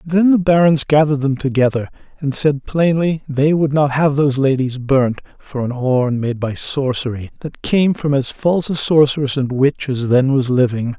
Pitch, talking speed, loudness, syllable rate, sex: 140 Hz, 190 wpm, -16 LUFS, 4.8 syllables/s, male